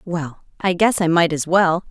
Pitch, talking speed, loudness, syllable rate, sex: 170 Hz, 220 wpm, -18 LUFS, 4.6 syllables/s, female